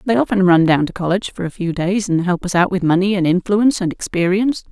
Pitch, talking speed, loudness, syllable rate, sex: 185 Hz, 255 wpm, -17 LUFS, 6.4 syllables/s, female